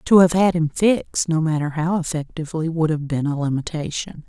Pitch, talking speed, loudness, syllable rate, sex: 160 Hz, 195 wpm, -20 LUFS, 5.5 syllables/s, female